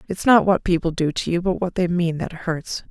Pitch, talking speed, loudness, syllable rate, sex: 175 Hz, 270 wpm, -21 LUFS, 5.2 syllables/s, female